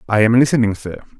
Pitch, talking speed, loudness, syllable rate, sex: 115 Hz, 200 wpm, -15 LUFS, 6.5 syllables/s, male